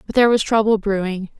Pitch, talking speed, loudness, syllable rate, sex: 210 Hz, 215 wpm, -18 LUFS, 6.7 syllables/s, female